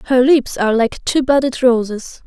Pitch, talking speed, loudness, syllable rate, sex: 250 Hz, 185 wpm, -15 LUFS, 5.1 syllables/s, female